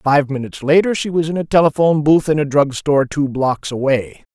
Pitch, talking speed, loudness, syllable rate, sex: 145 Hz, 220 wpm, -16 LUFS, 5.7 syllables/s, male